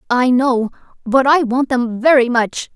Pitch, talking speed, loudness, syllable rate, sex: 250 Hz, 175 wpm, -15 LUFS, 4.2 syllables/s, female